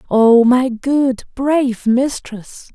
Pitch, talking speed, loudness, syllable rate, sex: 250 Hz, 110 wpm, -15 LUFS, 2.9 syllables/s, female